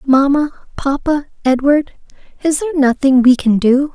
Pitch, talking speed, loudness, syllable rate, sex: 275 Hz, 135 wpm, -14 LUFS, 4.7 syllables/s, female